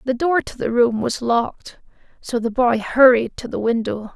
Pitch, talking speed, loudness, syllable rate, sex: 240 Hz, 200 wpm, -19 LUFS, 4.8 syllables/s, female